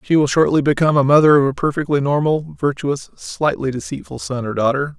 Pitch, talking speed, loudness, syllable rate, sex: 145 Hz, 190 wpm, -17 LUFS, 5.8 syllables/s, male